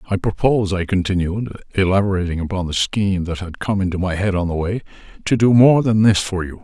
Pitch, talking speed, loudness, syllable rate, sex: 95 Hz, 215 wpm, -18 LUFS, 5.9 syllables/s, male